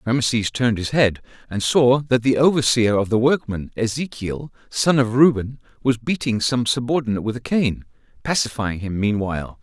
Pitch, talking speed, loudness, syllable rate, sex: 120 Hz, 160 wpm, -20 LUFS, 5.2 syllables/s, male